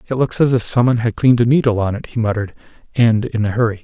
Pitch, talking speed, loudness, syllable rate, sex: 115 Hz, 280 wpm, -16 LUFS, 7.3 syllables/s, male